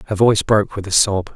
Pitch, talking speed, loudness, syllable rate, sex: 100 Hz, 265 wpm, -16 LUFS, 7.1 syllables/s, male